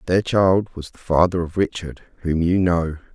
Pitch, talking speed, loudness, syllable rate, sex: 85 Hz, 190 wpm, -20 LUFS, 4.6 syllables/s, male